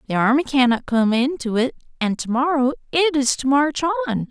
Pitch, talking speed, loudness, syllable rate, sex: 270 Hz, 195 wpm, -19 LUFS, 5.4 syllables/s, female